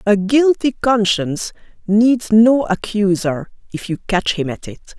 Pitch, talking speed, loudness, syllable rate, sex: 210 Hz, 145 wpm, -16 LUFS, 4.2 syllables/s, female